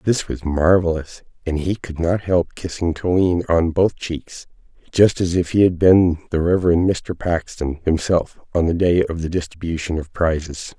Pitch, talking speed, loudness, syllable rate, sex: 85 Hz, 180 wpm, -19 LUFS, 4.6 syllables/s, male